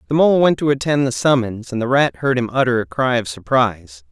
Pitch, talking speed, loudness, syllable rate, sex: 120 Hz, 250 wpm, -17 LUFS, 5.7 syllables/s, male